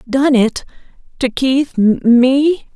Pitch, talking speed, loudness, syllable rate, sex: 260 Hz, 65 wpm, -14 LUFS, 2.5 syllables/s, female